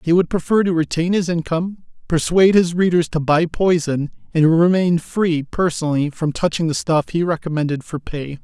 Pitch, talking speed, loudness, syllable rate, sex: 165 Hz, 180 wpm, -18 LUFS, 5.2 syllables/s, male